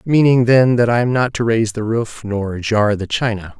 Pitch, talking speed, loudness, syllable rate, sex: 115 Hz, 235 wpm, -16 LUFS, 4.9 syllables/s, male